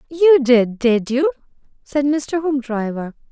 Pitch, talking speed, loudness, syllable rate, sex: 270 Hz, 125 wpm, -17 LUFS, 3.7 syllables/s, female